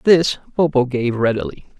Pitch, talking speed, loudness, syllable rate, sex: 135 Hz, 135 wpm, -18 LUFS, 4.8 syllables/s, male